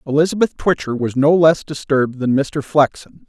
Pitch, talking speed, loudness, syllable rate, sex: 145 Hz, 165 wpm, -17 LUFS, 5.1 syllables/s, male